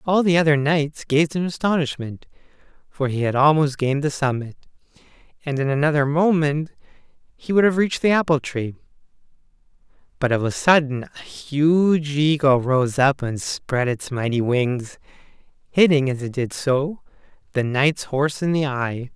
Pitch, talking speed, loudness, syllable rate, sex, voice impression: 145 Hz, 155 wpm, -20 LUFS, 4.6 syllables/s, male, masculine, very adult-like, middle-aged, slightly thick, slightly relaxed, slightly weak, slightly dark, slightly soft, slightly muffled, fluent, slightly cool, intellectual, refreshing, sincere, very calm, slightly friendly, reassuring, very unique, elegant, sweet, slightly lively, kind, very modest